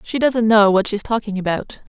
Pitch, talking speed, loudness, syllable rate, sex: 215 Hz, 215 wpm, -17 LUFS, 5.1 syllables/s, female